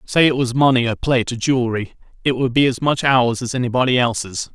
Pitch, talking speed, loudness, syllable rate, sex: 125 Hz, 225 wpm, -18 LUFS, 6.3 syllables/s, male